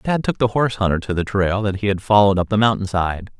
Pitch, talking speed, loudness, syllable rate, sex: 100 Hz, 285 wpm, -19 LUFS, 6.5 syllables/s, male